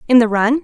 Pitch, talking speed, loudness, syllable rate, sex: 240 Hz, 280 wpm, -14 LUFS, 6.4 syllables/s, female